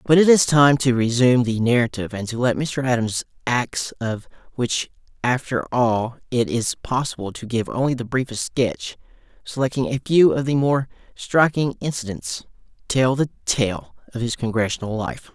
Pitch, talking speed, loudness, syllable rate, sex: 125 Hz, 155 wpm, -21 LUFS, 4.8 syllables/s, male